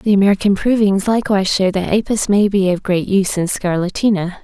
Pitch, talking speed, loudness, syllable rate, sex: 195 Hz, 190 wpm, -16 LUFS, 5.9 syllables/s, female